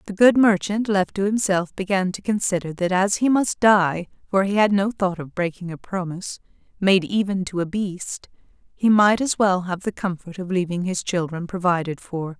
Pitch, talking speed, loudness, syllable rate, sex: 190 Hz, 190 wpm, -21 LUFS, 4.9 syllables/s, female